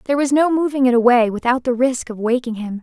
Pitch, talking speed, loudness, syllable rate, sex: 250 Hz, 255 wpm, -17 LUFS, 6.4 syllables/s, female